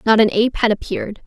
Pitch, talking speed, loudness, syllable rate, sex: 220 Hz, 240 wpm, -17 LUFS, 7.1 syllables/s, female